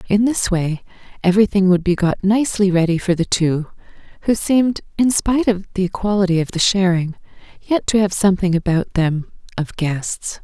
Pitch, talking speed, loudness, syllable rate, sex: 190 Hz, 175 wpm, -18 LUFS, 5.4 syllables/s, female